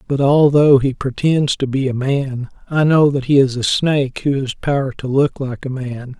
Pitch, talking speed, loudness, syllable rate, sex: 135 Hz, 225 wpm, -16 LUFS, 4.7 syllables/s, male